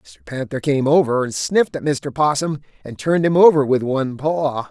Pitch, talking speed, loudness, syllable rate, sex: 140 Hz, 205 wpm, -18 LUFS, 5.3 syllables/s, male